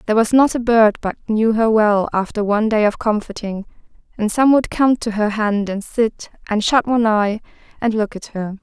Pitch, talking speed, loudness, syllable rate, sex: 220 Hz, 215 wpm, -17 LUFS, 5.1 syllables/s, female